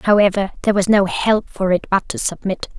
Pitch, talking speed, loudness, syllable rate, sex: 195 Hz, 215 wpm, -18 LUFS, 5.6 syllables/s, female